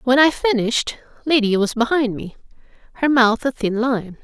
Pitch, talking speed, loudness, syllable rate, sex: 245 Hz, 170 wpm, -18 LUFS, 5.0 syllables/s, female